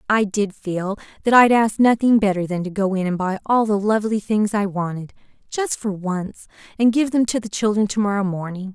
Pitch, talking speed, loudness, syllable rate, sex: 205 Hz, 215 wpm, -20 LUFS, 5.3 syllables/s, female